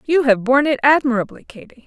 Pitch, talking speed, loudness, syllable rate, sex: 265 Hz, 195 wpm, -16 LUFS, 6.5 syllables/s, female